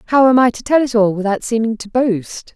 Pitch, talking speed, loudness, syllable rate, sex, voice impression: 230 Hz, 260 wpm, -15 LUFS, 5.6 syllables/s, female, feminine, adult-like, powerful, slightly bright, slightly soft, halting, intellectual, elegant, lively, slightly intense, slightly sharp